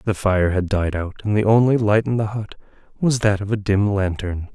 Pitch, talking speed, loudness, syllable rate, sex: 105 Hz, 235 wpm, -20 LUFS, 5.2 syllables/s, male